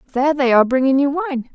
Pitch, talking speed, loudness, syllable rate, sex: 275 Hz, 235 wpm, -16 LUFS, 7.4 syllables/s, female